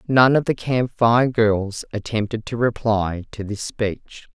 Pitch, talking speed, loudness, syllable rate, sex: 115 Hz, 165 wpm, -21 LUFS, 3.7 syllables/s, female